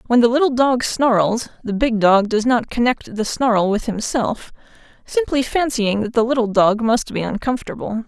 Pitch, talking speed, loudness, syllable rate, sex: 230 Hz, 180 wpm, -18 LUFS, 4.8 syllables/s, female